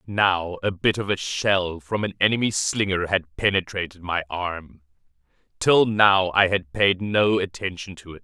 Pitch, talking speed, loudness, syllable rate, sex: 95 Hz, 170 wpm, -22 LUFS, 4.3 syllables/s, male